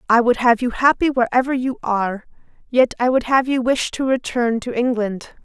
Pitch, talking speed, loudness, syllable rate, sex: 245 Hz, 200 wpm, -18 LUFS, 5.1 syllables/s, female